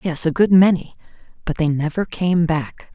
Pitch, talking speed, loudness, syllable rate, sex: 170 Hz, 140 wpm, -18 LUFS, 5.0 syllables/s, female